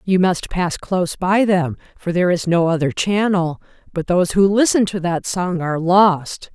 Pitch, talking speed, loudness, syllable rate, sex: 180 Hz, 195 wpm, -18 LUFS, 4.7 syllables/s, female